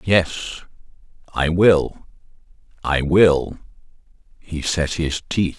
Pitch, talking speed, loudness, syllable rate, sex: 80 Hz, 75 wpm, -19 LUFS, 2.8 syllables/s, male